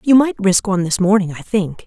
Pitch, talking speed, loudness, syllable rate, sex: 200 Hz, 255 wpm, -16 LUFS, 5.7 syllables/s, female